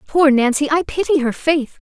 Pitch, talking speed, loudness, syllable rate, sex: 290 Hz, 190 wpm, -16 LUFS, 4.8 syllables/s, female